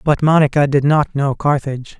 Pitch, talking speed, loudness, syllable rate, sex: 140 Hz, 180 wpm, -15 LUFS, 5.3 syllables/s, male